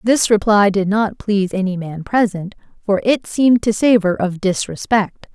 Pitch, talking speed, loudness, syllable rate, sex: 205 Hz, 170 wpm, -16 LUFS, 4.7 syllables/s, female